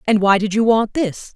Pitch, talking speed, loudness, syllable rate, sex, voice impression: 210 Hz, 265 wpm, -17 LUFS, 5.0 syllables/s, female, feminine, adult-like, tensed, powerful, bright, slightly soft, clear, fluent, intellectual, calm, friendly, reassuring, elegant, lively, kind